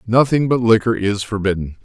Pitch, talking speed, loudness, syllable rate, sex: 110 Hz, 165 wpm, -17 LUFS, 5.3 syllables/s, male